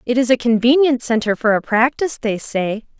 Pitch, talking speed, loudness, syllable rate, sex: 235 Hz, 200 wpm, -17 LUFS, 5.4 syllables/s, female